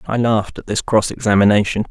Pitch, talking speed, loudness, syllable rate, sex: 110 Hz, 190 wpm, -16 LUFS, 6.3 syllables/s, male